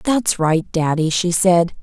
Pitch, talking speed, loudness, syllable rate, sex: 175 Hz, 165 wpm, -17 LUFS, 3.6 syllables/s, female